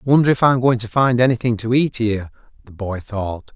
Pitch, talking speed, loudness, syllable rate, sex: 115 Hz, 220 wpm, -18 LUFS, 5.4 syllables/s, male